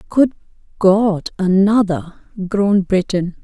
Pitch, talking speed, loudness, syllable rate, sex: 195 Hz, 70 wpm, -16 LUFS, 3.8 syllables/s, female